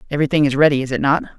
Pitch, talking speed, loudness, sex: 145 Hz, 260 wpm, -17 LUFS, male